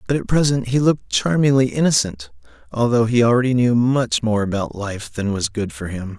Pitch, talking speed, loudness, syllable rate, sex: 115 Hz, 195 wpm, -19 LUFS, 5.3 syllables/s, male